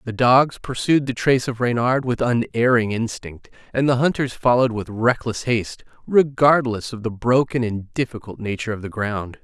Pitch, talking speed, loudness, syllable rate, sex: 120 Hz, 170 wpm, -20 LUFS, 5.1 syllables/s, male